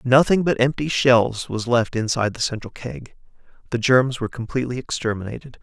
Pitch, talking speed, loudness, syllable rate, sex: 125 Hz, 160 wpm, -21 LUFS, 5.7 syllables/s, male